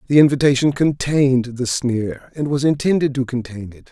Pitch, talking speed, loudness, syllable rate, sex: 135 Hz, 170 wpm, -18 LUFS, 5.2 syllables/s, male